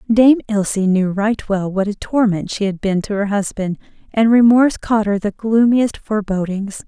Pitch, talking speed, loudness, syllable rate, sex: 210 Hz, 185 wpm, -17 LUFS, 4.9 syllables/s, female